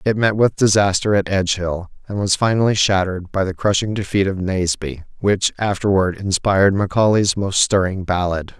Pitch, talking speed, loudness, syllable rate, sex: 95 Hz, 160 wpm, -18 LUFS, 5.3 syllables/s, male